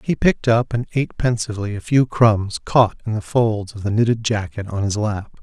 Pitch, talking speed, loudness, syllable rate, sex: 110 Hz, 220 wpm, -19 LUFS, 5.3 syllables/s, male